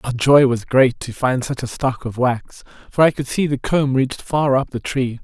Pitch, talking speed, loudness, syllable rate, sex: 130 Hz, 250 wpm, -18 LUFS, 4.7 syllables/s, male